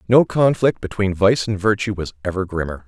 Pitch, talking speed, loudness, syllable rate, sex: 100 Hz, 190 wpm, -19 LUFS, 5.5 syllables/s, male